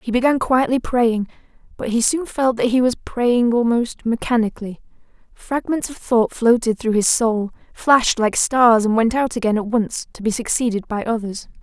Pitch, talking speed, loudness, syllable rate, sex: 235 Hz, 180 wpm, -18 LUFS, 4.9 syllables/s, female